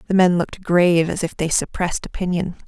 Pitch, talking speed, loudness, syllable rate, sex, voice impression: 175 Hz, 200 wpm, -20 LUFS, 6.2 syllables/s, female, feminine, adult-like, soft, sweet, kind